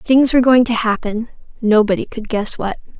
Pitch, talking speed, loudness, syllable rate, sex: 225 Hz, 180 wpm, -16 LUFS, 5.3 syllables/s, female